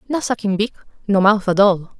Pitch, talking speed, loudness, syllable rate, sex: 205 Hz, 210 wpm, -17 LUFS, 5.4 syllables/s, female